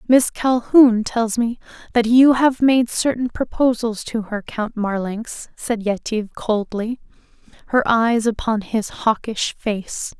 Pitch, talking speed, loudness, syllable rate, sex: 230 Hz, 135 wpm, -19 LUFS, 3.8 syllables/s, female